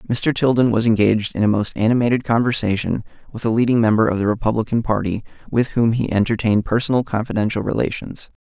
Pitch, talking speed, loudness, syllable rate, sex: 115 Hz, 170 wpm, -19 LUFS, 6.4 syllables/s, male